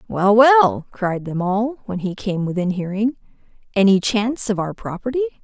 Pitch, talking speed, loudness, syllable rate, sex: 210 Hz, 165 wpm, -19 LUFS, 4.9 syllables/s, female